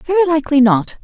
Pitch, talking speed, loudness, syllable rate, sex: 290 Hz, 175 wpm, -14 LUFS, 6.3 syllables/s, female